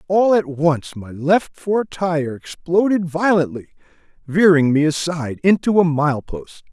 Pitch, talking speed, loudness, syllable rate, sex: 165 Hz, 145 wpm, -18 LUFS, 4.1 syllables/s, male